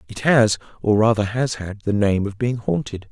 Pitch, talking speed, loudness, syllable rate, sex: 110 Hz, 210 wpm, -20 LUFS, 4.8 syllables/s, male